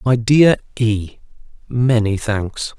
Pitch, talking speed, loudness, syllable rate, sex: 115 Hz, 85 wpm, -17 LUFS, 4.1 syllables/s, male